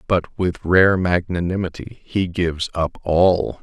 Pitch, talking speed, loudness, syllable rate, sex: 90 Hz, 130 wpm, -19 LUFS, 3.9 syllables/s, male